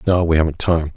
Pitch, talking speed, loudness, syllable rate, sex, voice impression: 80 Hz, 250 wpm, -17 LUFS, 6.2 syllables/s, male, masculine, adult-like, thick, cool, slightly calm